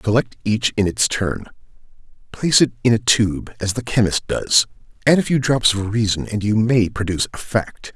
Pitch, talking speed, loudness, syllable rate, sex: 110 Hz, 195 wpm, -18 LUFS, 5.1 syllables/s, male